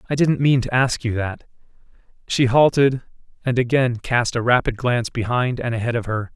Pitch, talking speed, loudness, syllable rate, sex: 125 Hz, 190 wpm, -20 LUFS, 5.3 syllables/s, male